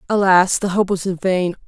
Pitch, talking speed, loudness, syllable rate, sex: 185 Hz, 180 wpm, -17 LUFS, 4.3 syllables/s, female